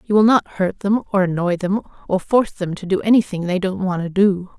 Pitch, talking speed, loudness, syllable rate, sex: 190 Hz, 250 wpm, -19 LUFS, 5.7 syllables/s, female